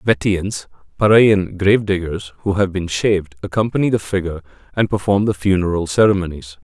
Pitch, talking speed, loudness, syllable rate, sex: 95 Hz, 145 wpm, -17 LUFS, 4.9 syllables/s, male